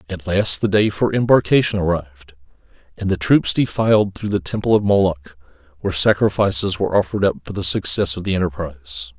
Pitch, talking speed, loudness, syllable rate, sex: 95 Hz, 175 wpm, -18 LUFS, 6.0 syllables/s, male